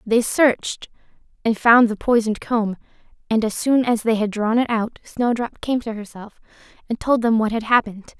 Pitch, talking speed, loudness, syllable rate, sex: 225 Hz, 190 wpm, -20 LUFS, 5.1 syllables/s, female